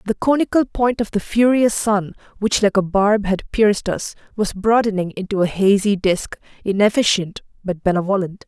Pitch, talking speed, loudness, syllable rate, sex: 205 Hz, 165 wpm, -18 LUFS, 5.0 syllables/s, female